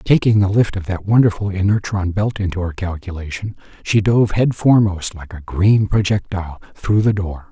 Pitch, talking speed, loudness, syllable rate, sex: 100 Hz, 170 wpm, -17 LUFS, 5.1 syllables/s, male